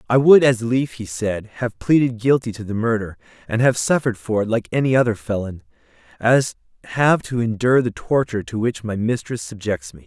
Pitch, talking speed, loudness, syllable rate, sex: 115 Hz, 195 wpm, -19 LUFS, 5.4 syllables/s, male